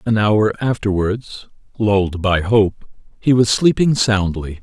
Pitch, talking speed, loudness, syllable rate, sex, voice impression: 105 Hz, 130 wpm, -17 LUFS, 3.8 syllables/s, male, very masculine, very adult-like, slightly old, very thick, tensed, very powerful, slightly bright, soft, very clear, fluent, slightly raspy, very cool, very intellectual, refreshing, very sincere, very calm, very mature, friendly, very reassuring, very unique, elegant, slightly wild, sweet, very lively, kind, slightly intense